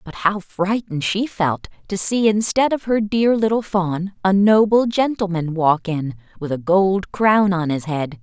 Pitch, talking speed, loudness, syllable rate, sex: 190 Hz, 180 wpm, -19 LUFS, 4.2 syllables/s, female